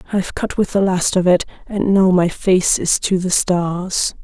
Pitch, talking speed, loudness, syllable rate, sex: 185 Hz, 215 wpm, -17 LUFS, 4.3 syllables/s, female